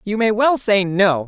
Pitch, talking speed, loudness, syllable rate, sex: 205 Hz, 235 wpm, -16 LUFS, 4.3 syllables/s, female